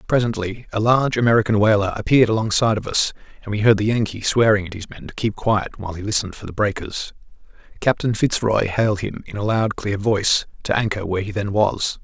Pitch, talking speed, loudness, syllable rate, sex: 105 Hz, 215 wpm, -20 LUFS, 6.2 syllables/s, male